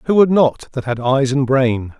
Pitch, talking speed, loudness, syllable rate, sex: 135 Hz, 240 wpm, -16 LUFS, 4.5 syllables/s, male